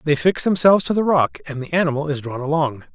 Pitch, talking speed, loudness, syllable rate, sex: 150 Hz, 245 wpm, -19 LUFS, 6.4 syllables/s, male